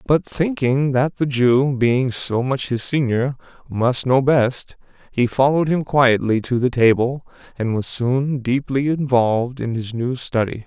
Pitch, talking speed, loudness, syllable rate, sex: 130 Hz, 165 wpm, -19 LUFS, 4.1 syllables/s, male